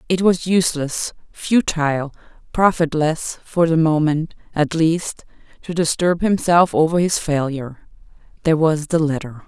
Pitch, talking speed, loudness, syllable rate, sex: 160 Hz, 120 wpm, -18 LUFS, 4.5 syllables/s, female